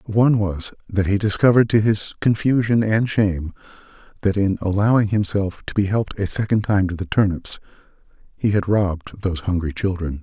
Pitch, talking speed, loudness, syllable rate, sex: 100 Hz, 170 wpm, -20 LUFS, 5.5 syllables/s, male